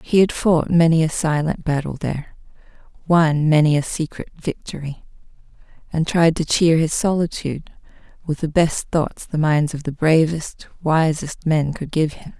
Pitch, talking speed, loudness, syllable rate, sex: 155 Hz, 160 wpm, -19 LUFS, 4.6 syllables/s, female